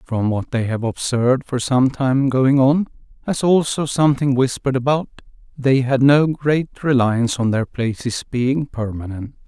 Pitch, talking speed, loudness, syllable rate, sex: 130 Hz, 160 wpm, -18 LUFS, 4.6 syllables/s, male